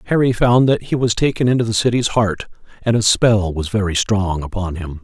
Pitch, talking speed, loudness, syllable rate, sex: 105 Hz, 215 wpm, -17 LUFS, 5.4 syllables/s, male